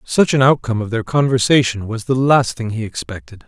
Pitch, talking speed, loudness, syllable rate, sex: 120 Hz, 205 wpm, -16 LUFS, 5.6 syllables/s, male